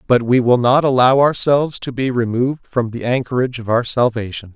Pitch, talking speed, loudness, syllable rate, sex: 125 Hz, 195 wpm, -16 LUFS, 5.7 syllables/s, male